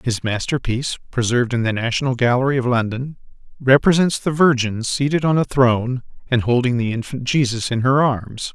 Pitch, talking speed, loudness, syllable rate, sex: 125 Hz, 170 wpm, -19 LUFS, 5.5 syllables/s, male